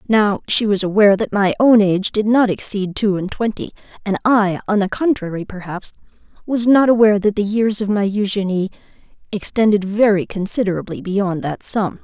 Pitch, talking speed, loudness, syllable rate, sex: 205 Hz, 175 wpm, -17 LUFS, 5.3 syllables/s, female